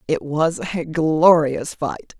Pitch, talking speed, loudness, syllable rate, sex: 150 Hz, 135 wpm, -19 LUFS, 3.2 syllables/s, female